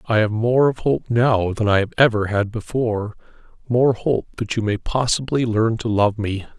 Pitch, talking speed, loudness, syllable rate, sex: 115 Hz, 190 wpm, -20 LUFS, 4.8 syllables/s, male